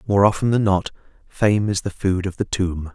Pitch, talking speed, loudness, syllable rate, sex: 100 Hz, 225 wpm, -20 LUFS, 5.0 syllables/s, male